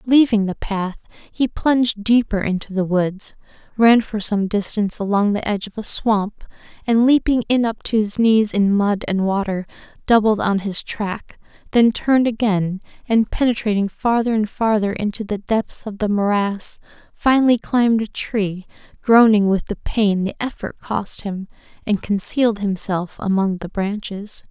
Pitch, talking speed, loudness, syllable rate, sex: 210 Hz, 160 wpm, -19 LUFS, 4.6 syllables/s, female